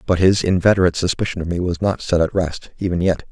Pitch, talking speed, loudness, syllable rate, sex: 90 Hz, 235 wpm, -19 LUFS, 6.4 syllables/s, male